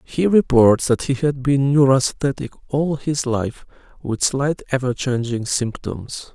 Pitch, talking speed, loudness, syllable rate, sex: 135 Hz, 140 wpm, -19 LUFS, 4.0 syllables/s, male